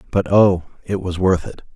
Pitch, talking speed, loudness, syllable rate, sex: 95 Hz, 205 wpm, -18 LUFS, 5.0 syllables/s, male